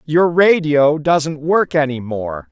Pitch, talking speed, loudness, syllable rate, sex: 150 Hz, 145 wpm, -15 LUFS, 3.3 syllables/s, male